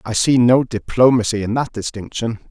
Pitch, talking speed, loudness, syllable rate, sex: 115 Hz, 170 wpm, -17 LUFS, 5.2 syllables/s, male